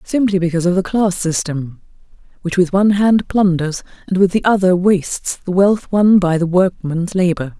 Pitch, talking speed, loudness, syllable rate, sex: 185 Hz, 180 wpm, -15 LUFS, 5.0 syllables/s, female